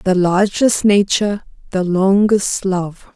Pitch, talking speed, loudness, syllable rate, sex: 195 Hz, 115 wpm, -15 LUFS, 3.7 syllables/s, female